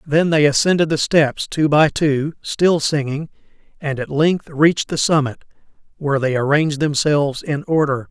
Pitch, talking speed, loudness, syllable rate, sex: 150 Hz, 165 wpm, -17 LUFS, 4.8 syllables/s, male